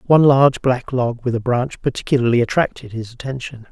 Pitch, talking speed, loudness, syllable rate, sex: 125 Hz, 180 wpm, -18 LUFS, 5.8 syllables/s, male